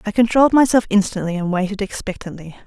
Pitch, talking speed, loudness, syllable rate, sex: 205 Hz, 160 wpm, -17 LUFS, 6.6 syllables/s, female